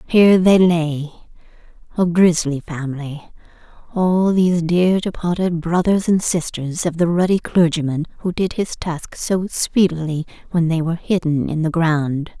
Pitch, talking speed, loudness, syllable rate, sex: 170 Hz, 145 wpm, -18 LUFS, 4.5 syllables/s, female